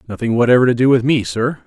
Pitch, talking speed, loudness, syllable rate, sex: 125 Hz, 255 wpm, -15 LUFS, 6.7 syllables/s, male